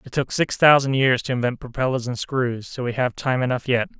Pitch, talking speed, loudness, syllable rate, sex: 125 Hz, 240 wpm, -21 LUFS, 5.5 syllables/s, male